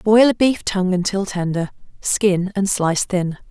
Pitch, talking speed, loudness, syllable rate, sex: 195 Hz, 170 wpm, -19 LUFS, 4.6 syllables/s, female